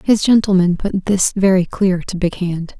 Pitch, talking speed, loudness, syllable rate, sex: 190 Hz, 195 wpm, -16 LUFS, 4.6 syllables/s, female